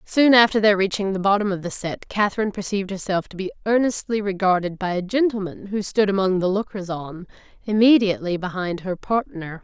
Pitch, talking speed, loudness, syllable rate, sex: 195 Hz, 180 wpm, -21 LUFS, 5.8 syllables/s, female